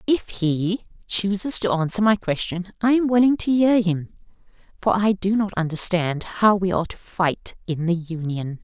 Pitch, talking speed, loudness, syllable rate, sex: 190 Hz, 180 wpm, -21 LUFS, 4.6 syllables/s, female